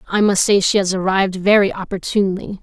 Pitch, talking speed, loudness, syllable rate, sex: 195 Hz, 185 wpm, -16 LUFS, 6.3 syllables/s, female